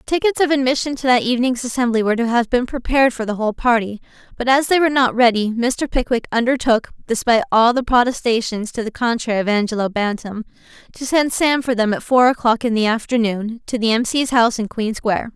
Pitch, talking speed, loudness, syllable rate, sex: 240 Hz, 210 wpm, -18 LUFS, 6.1 syllables/s, female